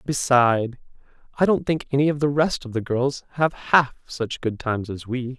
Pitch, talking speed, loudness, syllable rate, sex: 130 Hz, 200 wpm, -22 LUFS, 4.8 syllables/s, male